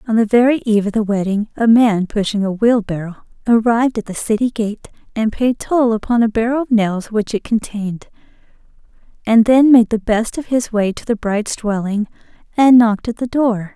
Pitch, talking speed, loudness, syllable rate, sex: 220 Hz, 195 wpm, -16 LUFS, 5.4 syllables/s, female